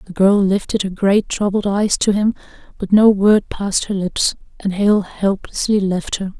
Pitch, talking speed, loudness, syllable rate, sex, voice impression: 200 Hz, 190 wpm, -17 LUFS, 4.5 syllables/s, female, very feminine, very adult-like, slightly middle-aged, very thin, very relaxed, very weak, very dark, soft, slightly muffled, fluent, very cute, intellectual, sincere, very calm, very friendly, very reassuring, very unique, elegant, very sweet, lively, kind, slightly modest